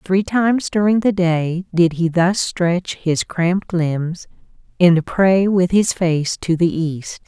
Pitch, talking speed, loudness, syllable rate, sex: 180 Hz, 165 wpm, -17 LUFS, 3.5 syllables/s, female